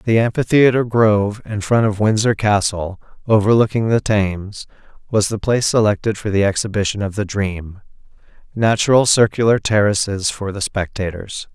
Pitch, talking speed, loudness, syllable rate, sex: 105 Hz, 140 wpm, -17 LUFS, 5.1 syllables/s, male